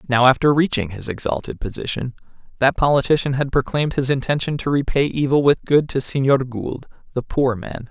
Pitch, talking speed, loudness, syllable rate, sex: 135 Hz, 165 wpm, -20 LUFS, 5.6 syllables/s, male